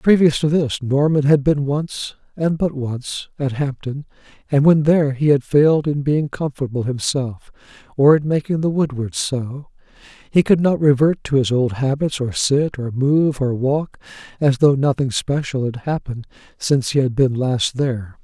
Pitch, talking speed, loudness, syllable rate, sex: 140 Hz, 180 wpm, -18 LUFS, 4.6 syllables/s, male